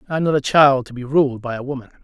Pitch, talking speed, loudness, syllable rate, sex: 135 Hz, 325 wpm, -18 LUFS, 6.9 syllables/s, male